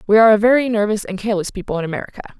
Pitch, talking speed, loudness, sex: 210 Hz, 250 wpm, -17 LUFS, female